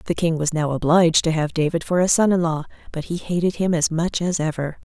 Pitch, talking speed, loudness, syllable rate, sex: 165 Hz, 255 wpm, -20 LUFS, 5.9 syllables/s, female